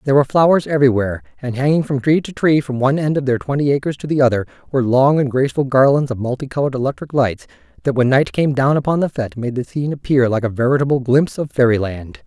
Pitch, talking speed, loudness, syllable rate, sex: 130 Hz, 230 wpm, -17 LUFS, 7.0 syllables/s, male